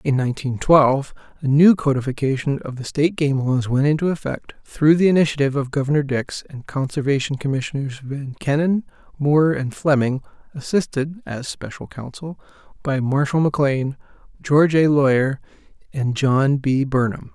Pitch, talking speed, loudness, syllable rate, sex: 140 Hz, 145 wpm, -20 LUFS, 5.1 syllables/s, male